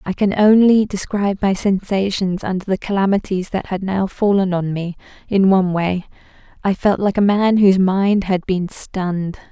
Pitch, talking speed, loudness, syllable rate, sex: 190 Hz, 175 wpm, -17 LUFS, 4.9 syllables/s, female